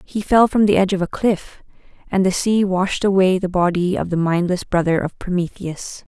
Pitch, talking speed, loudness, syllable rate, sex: 185 Hz, 205 wpm, -18 LUFS, 5.1 syllables/s, female